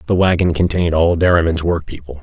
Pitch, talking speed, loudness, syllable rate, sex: 85 Hz, 160 wpm, -15 LUFS, 6.3 syllables/s, male